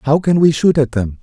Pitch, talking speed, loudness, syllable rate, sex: 145 Hz, 295 wpm, -14 LUFS, 5.1 syllables/s, male